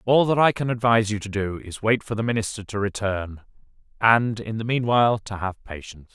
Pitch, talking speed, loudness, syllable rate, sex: 110 Hz, 215 wpm, -23 LUFS, 5.7 syllables/s, male